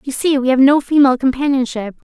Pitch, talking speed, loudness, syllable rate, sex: 270 Hz, 195 wpm, -14 LUFS, 6.2 syllables/s, female